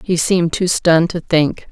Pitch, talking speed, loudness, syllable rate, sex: 170 Hz, 210 wpm, -15 LUFS, 5.0 syllables/s, female